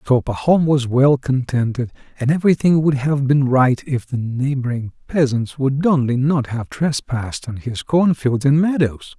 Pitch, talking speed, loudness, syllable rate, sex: 135 Hz, 170 wpm, -18 LUFS, 4.6 syllables/s, male